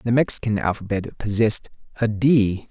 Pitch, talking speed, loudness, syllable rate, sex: 110 Hz, 135 wpm, -21 LUFS, 5.2 syllables/s, male